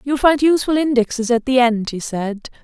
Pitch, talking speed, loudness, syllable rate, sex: 255 Hz, 205 wpm, -17 LUFS, 5.6 syllables/s, female